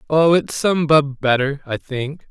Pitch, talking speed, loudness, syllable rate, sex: 145 Hz, 180 wpm, -18 LUFS, 3.8 syllables/s, male